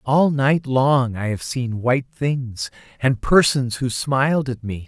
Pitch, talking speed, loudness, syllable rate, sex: 130 Hz, 170 wpm, -20 LUFS, 3.8 syllables/s, male